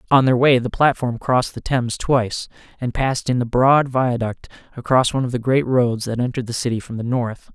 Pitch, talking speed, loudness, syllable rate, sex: 125 Hz, 225 wpm, -19 LUFS, 5.8 syllables/s, male